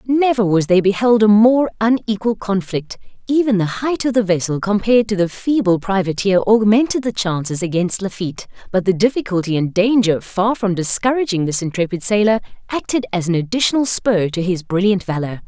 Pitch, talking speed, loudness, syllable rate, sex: 205 Hz, 170 wpm, -17 LUFS, 5.5 syllables/s, female